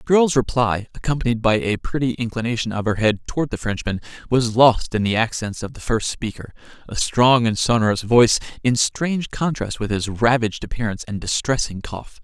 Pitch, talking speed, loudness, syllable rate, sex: 115 Hz, 180 wpm, -20 LUFS, 5.6 syllables/s, male